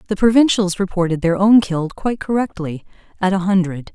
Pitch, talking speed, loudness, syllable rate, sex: 190 Hz, 165 wpm, -17 LUFS, 5.9 syllables/s, female